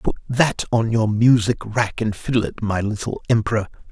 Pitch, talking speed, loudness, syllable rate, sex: 110 Hz, 185 wpm, -20 LUFS, 5.0 syllables/s, male